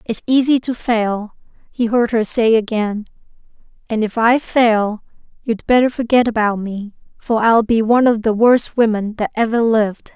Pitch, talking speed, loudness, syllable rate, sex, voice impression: 225 Hz, 170 wpm, -16 LUFS, 4.7 syllables/s, female, feminine, slightly adult-like, slightly cute, slightly refreshing, friendly, slightly kind